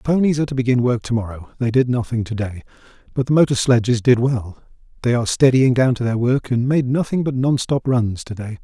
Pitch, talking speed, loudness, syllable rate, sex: 125 Hz, 230 wpm, -18 LUFS, 6.0 syllables/s, male